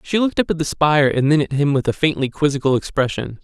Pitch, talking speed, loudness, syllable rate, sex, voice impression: 150 Hz, 260 wpm, -18 LUFS, 6.6 syllables/s, male, masculine, slightly gender-neutral, adult-like, slightly middle-aged, slightly thin, tensed, slightly weak, bright, slightly soft, very clear, fluent, slightly cool, intellectual, very refreshing, sincere, calm, friendly, reassuring, unique, elegant, sweet, lively, kind, slightly modest